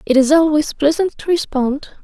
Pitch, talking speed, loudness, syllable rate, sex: 300 Hz, 175 wpm, -16 LUFS, 5.0 syllables/s, female